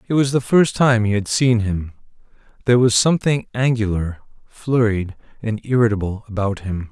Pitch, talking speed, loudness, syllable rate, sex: 115 Hz, 155 wpm, -19 LUFS, 5.2 syllables/s, male